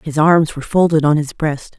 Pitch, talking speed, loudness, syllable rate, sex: 155 Hz, 235 wpm, -15 LUFS, 5.3 syllables/s, female